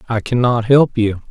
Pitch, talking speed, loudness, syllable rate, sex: 120 Hz, 230 wpm, -15 LUFS, 4.7 syllables/s, male